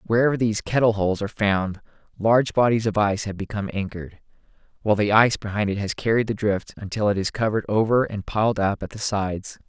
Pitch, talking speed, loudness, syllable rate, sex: 105 Hz, 205 wpm, -22 LUFS, 6.6 syllables/s, male